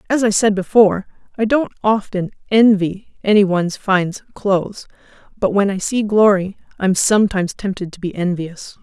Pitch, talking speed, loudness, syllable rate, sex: 200 Hz, 155 wpm, -17 LUFS, 5.2 syllables/s, female